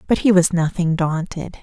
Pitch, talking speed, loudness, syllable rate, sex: 175 Hz, 185 wpm, -18 LUFS, 4.9 syllables/s, female